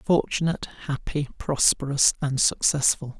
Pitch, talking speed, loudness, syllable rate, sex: 145 Hz, 95 wpm, -23 LUFS, 4.7 syllables/s, male